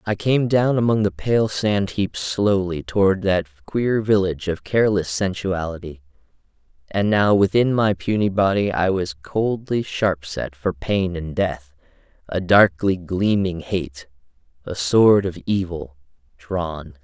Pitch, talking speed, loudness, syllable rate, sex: 95 Hz, 135 wpm, -20 LUFS, 4.0 syllables/s, male